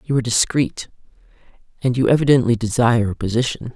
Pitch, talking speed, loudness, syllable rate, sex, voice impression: 120 Hz, 145 wpm, -18 LUFS, 6.6 syllables/s, male, masculine, adult-like, tensed, powerful, slightly dark, hard, fluent, cool, calm, wild, lively, slightly strict, slightly intense, slightly sharp